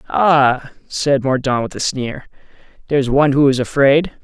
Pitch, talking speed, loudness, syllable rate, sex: 135 Hz, 155 wpm, -16 LUFS, 4.7 syllables/s, male